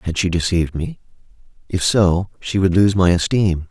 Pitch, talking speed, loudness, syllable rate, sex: 90 Hz, 180 wpm, -18 LUFS, 5.0 syllables/s, male